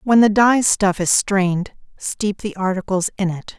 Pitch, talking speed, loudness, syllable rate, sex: 200 Hz, 185 wpm, -18 LUFS, 4.3 syllables/s, female